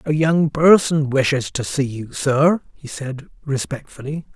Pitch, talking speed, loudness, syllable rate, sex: 140 Hz, 150 wpm, -19 LUFS, 4.1 syllables/s, male